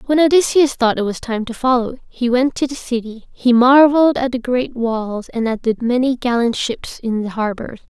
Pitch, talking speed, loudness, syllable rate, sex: 245 Hz, 210 wpm, -17 LUFS, 5.0 syllables/s, female